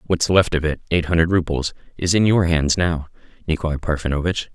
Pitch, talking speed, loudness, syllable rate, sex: 80 Hz, 185 wpm, -20 LUFS, 5.6 syllables/s, male